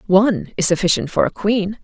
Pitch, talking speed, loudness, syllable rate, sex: 195 Hz, 195 wpm, -17 LUFS, 5.5 syllables/s, female